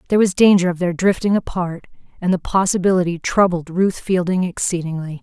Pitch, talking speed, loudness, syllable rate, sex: 180 Hz, 160 wpm, -18 LUFS, 5.8 syllables/s, female